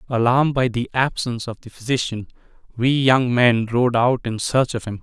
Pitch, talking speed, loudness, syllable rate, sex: 120 Hz, 190 wpm, -19 LUFS, 5.1 syllables/s, male